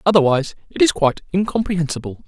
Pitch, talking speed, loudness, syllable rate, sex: 170 Hz, 130 wpm, -19 LUFS, 7.3 syllables/s, male